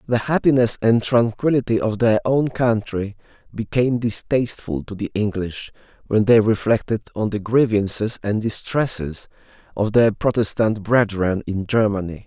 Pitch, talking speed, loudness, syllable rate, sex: 110 Hz, 130 wpm, -20 LUFS, 4.7 syllables/s, male